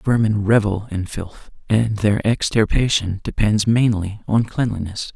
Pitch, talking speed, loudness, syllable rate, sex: 105 Hz, 130 wpm, -19 LUFS, 4.1 syllables/s, male